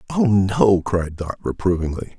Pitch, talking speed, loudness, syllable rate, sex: 100 Hz, 135 wpm, -20 LUFS, 4.5 syllables/s, male